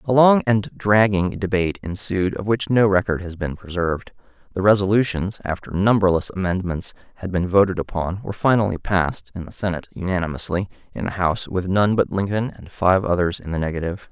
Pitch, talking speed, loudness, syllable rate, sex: 95 Hz, 180 wpm, -21 LUFS, 5.8 syllables/s, male